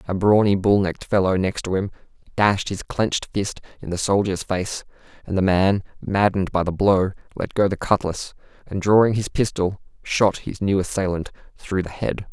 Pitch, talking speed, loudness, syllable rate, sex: 95 Hz, 180 wpm, -21 LUFS, 5.0 syllables/s, male